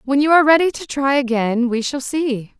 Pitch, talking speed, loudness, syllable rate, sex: 270 Hz, 230 wpm, -17 LUFS, 5.3 syllables/s, female